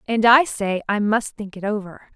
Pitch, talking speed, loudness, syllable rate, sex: 210 Hz, 225 wpm, -20 LUFS, 4.7 syllables/s, female